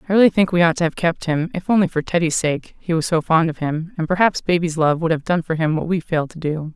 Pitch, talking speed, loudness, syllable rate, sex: 170 Hz, 300 wpm, -19 LUFS, 6.2 syllables/s, female